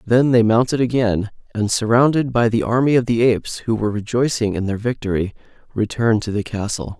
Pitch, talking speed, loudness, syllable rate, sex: 115 Hz, 190 wpm, -18 LUFS, 5.6 syllables/s, male